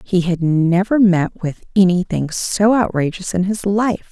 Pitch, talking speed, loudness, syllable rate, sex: 185 Hz, 160 wpm, -17 LUFS, 4.1 syllables/s, female